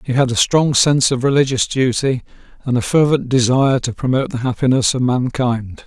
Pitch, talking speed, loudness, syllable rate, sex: 130 Hz, 185 wpm, -16 LUFS, 5.6 syllables/s, male